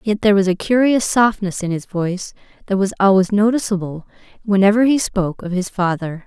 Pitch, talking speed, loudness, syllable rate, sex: 200 Hz, 180 wpm, -17 LUFS, 5.8 syllables/s, female